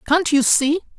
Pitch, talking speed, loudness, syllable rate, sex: 310 Hz, 185 wpm, -17 LUFS, 4.6 syllables/s, female